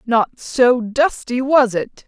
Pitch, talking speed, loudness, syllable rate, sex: 245 Hz, 145 wpm, -17 LUFS, 3.1 syllables/s, female